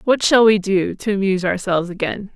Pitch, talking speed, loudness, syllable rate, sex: 195 Hz, 205 wpm, -17 LUFS, 5.8 syllables/s, female